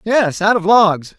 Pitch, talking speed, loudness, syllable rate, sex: 195 Hz, 200 wpm, -14 LUFS, 3.7 syllables/s, male